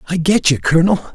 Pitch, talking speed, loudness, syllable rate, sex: 170 Hz, 210 wpm, -14 LUFS, 6.3 syllables/s, male